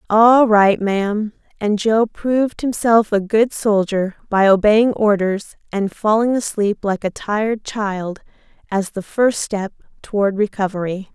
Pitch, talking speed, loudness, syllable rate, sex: 210 Hz, 140 wpm, -17 LUFS, 4.1 syllables/s, female